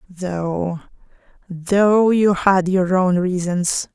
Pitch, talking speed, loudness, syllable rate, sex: 185 Hz, 105 wpm, -18 LUFS, 2.6 syllables/s, female